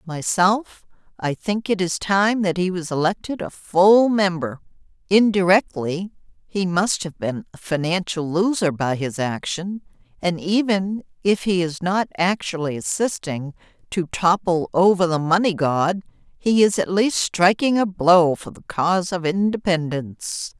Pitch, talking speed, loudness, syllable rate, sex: 180 Hz, 145 wpm, -20 LUFS, 4.2 syllables/s, female